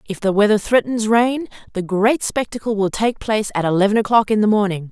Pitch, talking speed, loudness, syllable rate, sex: 210 Hz, 205 wpm, -18 LUFS, 5.8 syllables/s, female